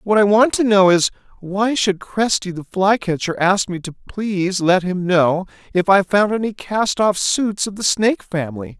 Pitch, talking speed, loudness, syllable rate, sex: 195 Hz, 200 wpm, -17 LUFS, 4.6 syllables/s, male